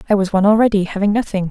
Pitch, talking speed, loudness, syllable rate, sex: 200 Hz, 240 wpm, -15 LUFS, 8.3 syllables/s, female